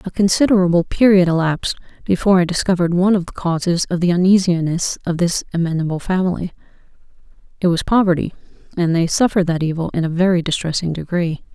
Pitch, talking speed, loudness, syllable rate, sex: 175 Hz, 160 wpm, -17 LUFS, 6.5 syllables/s, female